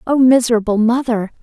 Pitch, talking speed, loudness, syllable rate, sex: 235 Hz, 125 wpm, -14 LUFS, 5.8 syllables/s, female